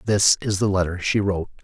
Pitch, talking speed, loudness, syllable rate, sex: 95 Hz, 220 wpm, -21 LUFS, 6.1 syllables/s, male